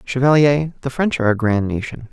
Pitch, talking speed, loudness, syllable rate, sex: 130 Hz, 200 wpm, -17 LUFS, 5.7 syllables/s, male